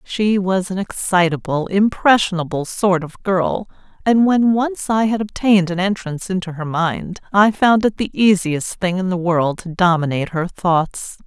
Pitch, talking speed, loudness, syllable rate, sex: 185 Hz, 170 wpm, -18 LUFS, 4.5 syllables/s, female